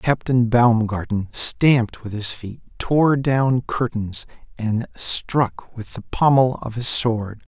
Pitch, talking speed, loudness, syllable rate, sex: 120 Hz, 135 wpm, -20 LUFS, 3.4 syllables/s, male